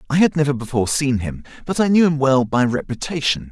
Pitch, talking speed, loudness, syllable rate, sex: 135 Hz, 220 wpm, -18 LUFS, 6.1 syllables/s, male